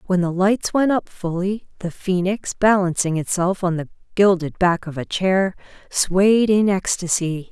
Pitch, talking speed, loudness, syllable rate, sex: 185 Hz, 160 wpm, -20 LUFS, 4.2 syllables/s, female